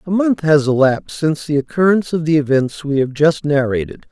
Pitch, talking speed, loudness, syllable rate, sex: 155 Hz, 205 wpm, -16 LUFS, 5.8 syllables/s, male